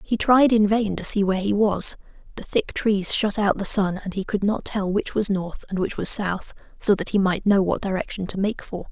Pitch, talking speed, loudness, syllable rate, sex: 200 Hz, 255 wpm, -22 LUFS, 5.1 syllables/s, female